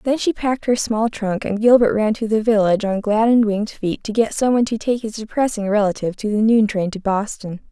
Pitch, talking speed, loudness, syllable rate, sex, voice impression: 215 Hz, 250 wpm, -18 LUFS, 5.9 syllables/s, female, very feminine, slightly adult-like, sincere, friendly, slightly kind